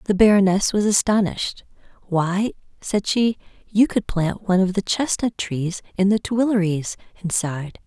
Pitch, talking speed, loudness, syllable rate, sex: 195 Hz, 145 wpm, -21 LUFS, 4.8 syllables/s, female